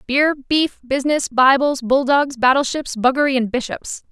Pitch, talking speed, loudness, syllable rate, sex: 270 Hz, 130 wpm, -17 LUFS, 4.8 syllables/s, female